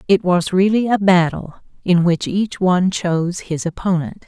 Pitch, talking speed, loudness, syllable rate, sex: 185 Hz, 170 wpm, -17 LUFS, 4.7 syllables/s, female